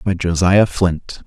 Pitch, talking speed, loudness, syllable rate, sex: 90 Hz, 140 wpm, -16 LUFS, 3.4 syllables/s, male